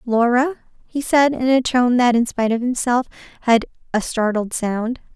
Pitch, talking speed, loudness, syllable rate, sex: 240 Hz, 175 wpm, -19 LUFS, 4.7 syllables/s, female